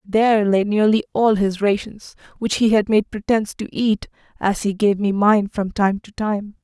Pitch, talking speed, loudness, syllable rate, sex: 210 Hz, 200 wpm, -19 LUFS, 4.6 syllables/s, female